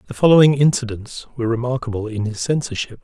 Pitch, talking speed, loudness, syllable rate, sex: 120 Hz, 160 wpm, -18 LUFS, 6.5 syllables/s, male